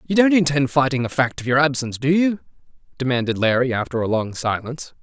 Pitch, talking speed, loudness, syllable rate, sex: 135 Hz, 205 wpm, -20 LUFS, 6.3 syllables/s, male